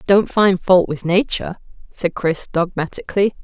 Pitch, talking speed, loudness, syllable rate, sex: 185 Hz, 140 wpm, -18 LUFS, 4.8 syllables/s, female